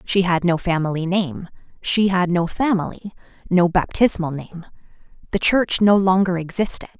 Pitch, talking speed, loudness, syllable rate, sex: 180 Hz, 145 wpm, -19 LUFS, 4.8 syllables/s, female